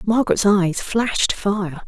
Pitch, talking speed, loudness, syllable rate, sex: 200 Hz, 130 wpm, -19 LUFS, 4.1 syllables/s, female